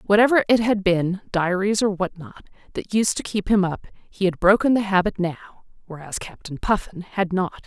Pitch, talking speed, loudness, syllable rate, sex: 195 Hz, 195 wpm, -21 LUFS, 4.8 syllables/s, female